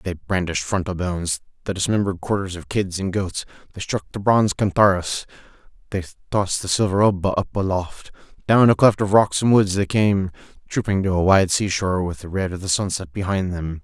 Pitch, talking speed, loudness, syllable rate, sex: 95 Hz, 195 wpm, -21 LUFS, 5.6 syllables/s, male